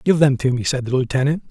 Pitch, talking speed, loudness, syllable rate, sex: 135 Hz, 280 wpm, -19 LUFS, 6.6 syllables/s, male